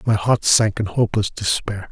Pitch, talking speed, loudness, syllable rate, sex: 105 Hz, 190 wpm, -19 LUFS, 5.0 syllables/s, male